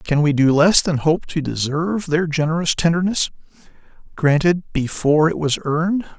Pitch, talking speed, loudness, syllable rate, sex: 160 Hz, 155 wpm, -18 LUFS, 5.2 syllables/s, male